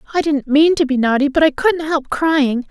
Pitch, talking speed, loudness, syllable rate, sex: 295 Hz, 245 wpm, -15 LUFS, 4.9 syllables/s, female